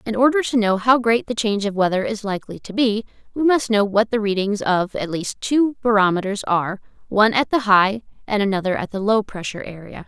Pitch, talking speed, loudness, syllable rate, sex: 215 Hz, 215 wpm, -19 LUFS, 5.8 syllables/s, female